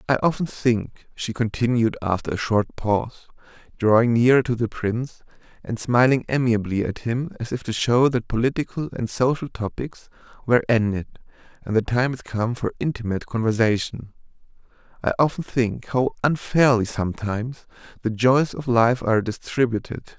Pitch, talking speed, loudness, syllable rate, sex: 120 Hz, 145 wpm, -22 LUFS, 5.2 syllables/s, male